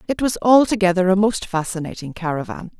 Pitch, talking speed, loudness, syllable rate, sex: 190 Hz, 150 wpm, -19 LUFS, 5.9 syllables/s, female